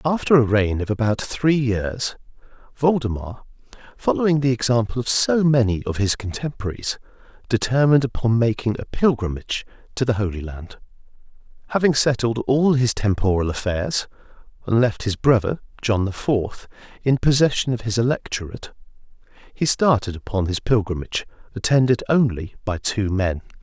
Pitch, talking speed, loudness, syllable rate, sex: 115 Hz, 135 wpm, -21 LUFS, 5.3 syllables/s, male